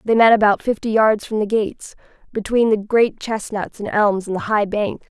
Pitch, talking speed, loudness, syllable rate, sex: 215 Hz, 210 wpm, -18 LUFS, 5.0 syllables/s, female